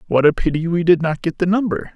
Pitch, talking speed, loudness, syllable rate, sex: 170 Hz, 275 wpm, -18 LUFS, 6.2 syllables/s, male